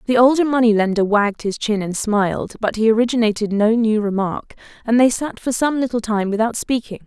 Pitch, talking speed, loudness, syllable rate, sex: 225 Hz, 205 wpm, -18 LUFS, 5.7 syllables/s, female